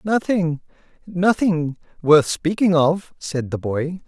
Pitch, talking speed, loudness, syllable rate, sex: 170 Hz, 105 wpm, -20 LUFS, 3.4 syllables/s, male